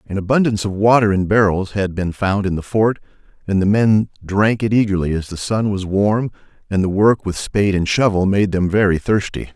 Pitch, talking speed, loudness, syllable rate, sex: 100 Hz, 215 wpm, -17 LUFS, 5.4 syllables/s, male